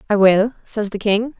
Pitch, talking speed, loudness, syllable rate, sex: 210 Hz, 215 wpm, -18 LUFS, 4.6 syllables/s, female